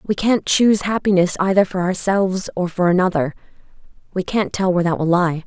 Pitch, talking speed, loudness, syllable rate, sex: 185 Hz, 185 wpm, -18 LUFS, 5.8 syllables/s, female